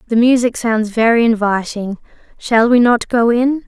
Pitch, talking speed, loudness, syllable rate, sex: 230 Hz, 165 wpm, -14 LUFS, 4.6 syllables/s, female